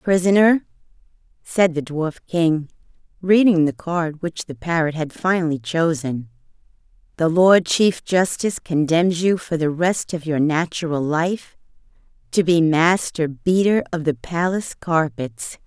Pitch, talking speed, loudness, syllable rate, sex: 165 Hz, 135 wpm, -19 LUFS, 4.2 syllables/s, female